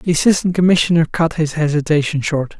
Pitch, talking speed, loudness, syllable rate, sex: 160 Hz, 160 wpm, -16 LUFS, 5.9 syllables/s, male